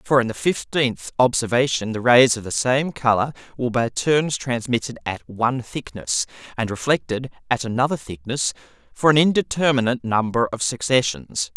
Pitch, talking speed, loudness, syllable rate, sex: 120 Hz, 150 wpm, -21 LUFS, 5.1 syllables/s, male